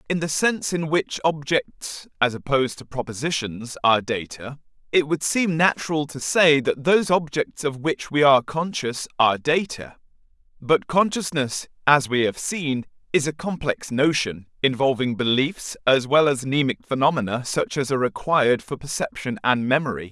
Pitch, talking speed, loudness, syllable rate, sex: 145 Hz, 160 wpm, -22 LUFS, 4.6 syllables/s, male